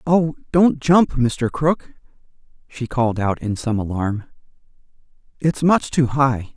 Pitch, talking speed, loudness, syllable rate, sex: 135 Hz, 135 wpm, -19 LUFS, 3.9 syllables/s, male